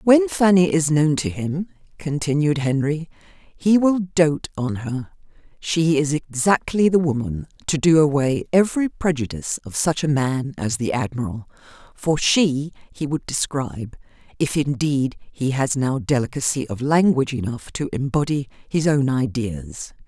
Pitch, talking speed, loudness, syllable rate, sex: 145 Hz, 145 wpm, -21 LUFS, 4.5 syllables/s, female